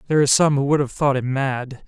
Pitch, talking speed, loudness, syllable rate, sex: 135 Hz, 290 wpm, -19 LUFS, 6.5 syllables/s, male